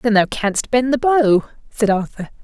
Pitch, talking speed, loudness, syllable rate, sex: 225 Hz, 195 wpm, -17 LUFS, 4.4 syllables/s, female